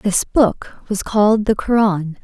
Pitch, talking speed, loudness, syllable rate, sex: 205 Hz, 160 wpm, -17 LUFS, 3.8 syllables/s, female